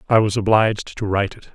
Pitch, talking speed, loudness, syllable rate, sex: 105 Hz, 235 wpm, -19 LUFS, 6.6 syllables/s, male